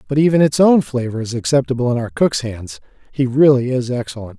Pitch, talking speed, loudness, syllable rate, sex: 130 Hz, 190 wpm, -16 LUFS, 5.9 syllables/s, male